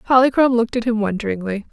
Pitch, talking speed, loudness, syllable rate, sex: 230 Hz, 175 wpm, -18 LUFS, 7.6 syllables/s, female